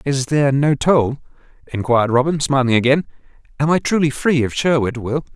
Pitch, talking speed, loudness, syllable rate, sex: 140 Hz, 170 wpm, -17 LUFS, 5.5 syllables/s, male